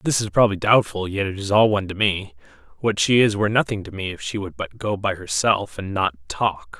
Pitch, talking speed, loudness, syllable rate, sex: 100 Hz, 245 wpm, -21 LUFS, 5.6 syllables/s, male